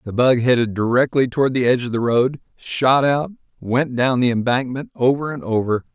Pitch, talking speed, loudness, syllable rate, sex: 125 Hz, 190 wpm, -18 LUFS, 5.3 syllables/s, male